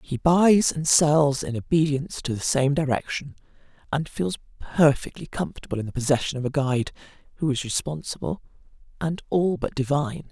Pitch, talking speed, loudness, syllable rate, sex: 150 Hz, 155 wpm, -24 LUFS, 5.4 syllables/s, female